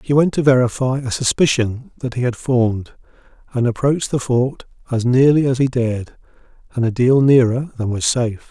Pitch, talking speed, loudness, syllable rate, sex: 125 Hz, 185 wpm, -17 LUFS, 5.4 syllables/s, male